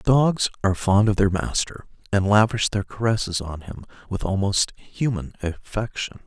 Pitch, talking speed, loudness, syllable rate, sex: 100 Hz, 165 wpm, -23 LUFS, 5.0 syllables/s, male